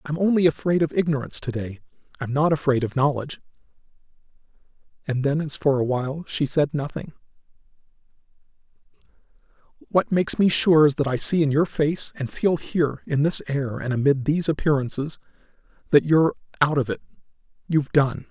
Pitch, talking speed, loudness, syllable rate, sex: 145 Hz, 155 wpm, -22 LUFS, 5.9 syllables/s, male